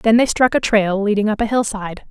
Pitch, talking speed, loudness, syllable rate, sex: 215 Hz, 255 wpm, -17 LUFS, 5.8 syllables/s, female